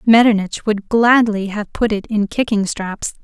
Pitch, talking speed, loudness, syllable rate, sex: 215 Hz, 165 wpm, -16 LUFS, 4.3 syllables/s, female